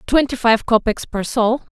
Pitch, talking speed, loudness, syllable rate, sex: 235 Hz, 170 wpm, -18 LUFS, 4.5 syllables/s, female